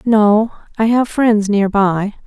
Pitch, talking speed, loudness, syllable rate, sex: 215 Hz, 160 wpm, -15 LUFS, 3.3 syllables/s, female